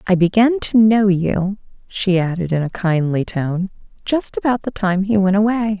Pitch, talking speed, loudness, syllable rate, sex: 195 Hz, 185 wpm, -17 LUFS, 4.6 syllables/s, female